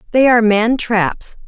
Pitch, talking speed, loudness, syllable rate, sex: 225 Hz, 160 wpm, -14 LUFS, 4.4 syllables/s, female